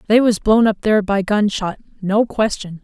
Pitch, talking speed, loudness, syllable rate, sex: 210 Hz, 190 wpm, -17 LUFS, 5.0 syllables/s, female